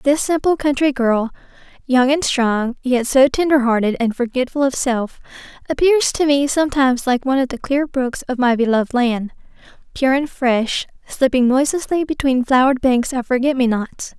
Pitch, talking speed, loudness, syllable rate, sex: 260 Hz, 175 wpm, -17 LUFS, 5.1 syllables/s, female